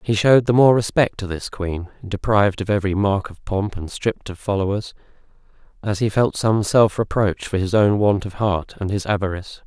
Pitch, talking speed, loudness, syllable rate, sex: 100 Hz, 205 wpm, -20 LUFS, 5.4 syllables/s, male